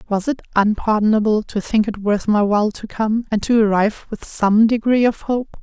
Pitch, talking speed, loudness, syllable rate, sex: 215 Hz, 205 wpm, -18 LUFS, 5.2 syllables/s, female